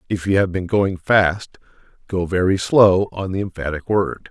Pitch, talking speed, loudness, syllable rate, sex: 95 Hz, 180 wpm, -18 LUFS, 4.6 syllables/s, male